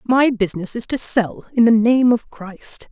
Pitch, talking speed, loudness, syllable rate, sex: 225 Hz, 205 wpm, -17 LUFS, 4.4 syllables/s, female